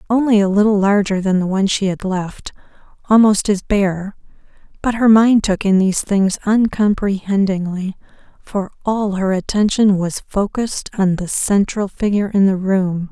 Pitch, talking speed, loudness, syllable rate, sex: 200 Hz, 155 wpm, -16 LUFS, 4.7 syllables/s, female